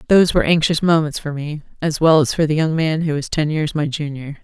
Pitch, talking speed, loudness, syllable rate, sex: 155 Hz, 255 wpm, -18 LUFS, 6.0 syllables/s, female